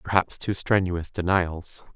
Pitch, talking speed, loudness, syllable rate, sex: 90 Hz, 125 wpm, -25 LUFS, 3.9 syllables/s, male